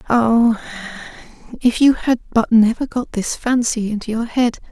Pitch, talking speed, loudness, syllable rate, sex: 230 Hz, 155 wpm, -17 LUFS, 4.6 syllables/s, female